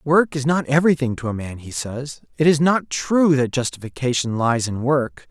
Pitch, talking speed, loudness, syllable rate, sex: 140 Hz, 205 wpm, -20 LUFS, 4.9 syllables/s, male